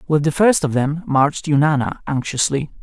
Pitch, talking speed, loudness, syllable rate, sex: 150 Hz, 170 wpm, -18 LUFS, 5.2 syllables/s, male